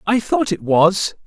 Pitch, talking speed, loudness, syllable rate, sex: 190 Hz, 190 wpm, -17 LUFS, 3.8 syllables/s, male